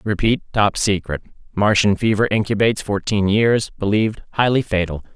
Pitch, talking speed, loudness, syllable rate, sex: 105 Hz, 115 wpm, -18 LUFS, 5.3 syllables/s, male